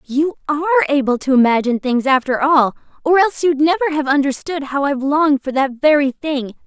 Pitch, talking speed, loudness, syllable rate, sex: 285 Hz, 190 wpm, -16 LUFS, 6.0 syllables/s, female